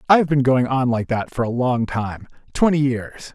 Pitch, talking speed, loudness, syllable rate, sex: 130 Hz, 215 wpm, -20 LUFS, 4.8 syllables/s, male